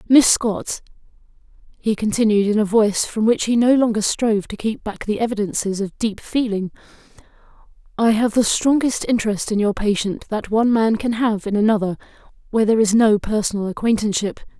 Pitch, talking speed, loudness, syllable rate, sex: 215 Hz, 175 wpm, -19 LUFS, 5.7 syllables/s, female